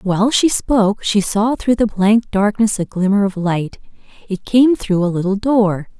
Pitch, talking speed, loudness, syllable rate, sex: 205 Hz, 190 wpm, -16 LUFS, 4.5 syllables/s, female